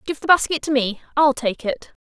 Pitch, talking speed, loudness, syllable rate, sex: 280 Hz, 205 wpm, -20 LUFS, 5.3 syllables/s, female